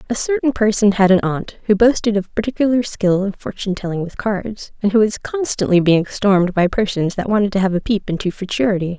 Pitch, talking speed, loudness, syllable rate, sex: 205 Hz, 215 wpm, -17 LUFS, 5.8 syllables/s, female